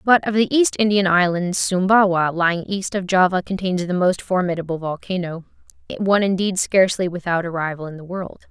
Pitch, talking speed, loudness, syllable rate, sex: 185 Hz, 170 wpm, -19 LUFS, 5.6 syllables/s, female